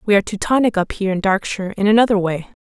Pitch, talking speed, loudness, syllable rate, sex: 205 Hz, 230 wpm, -17 LUFS, 7.6 syllables/s, female